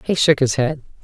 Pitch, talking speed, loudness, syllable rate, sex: 145 Hz, 230 wpm, -18 LUFS, 5.3 syllables/s, female